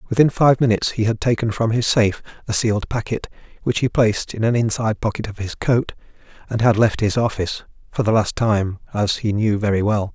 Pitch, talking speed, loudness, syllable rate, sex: 110 Hz, 205 wpm, -19 LUFS, 6.0 syllables/s, male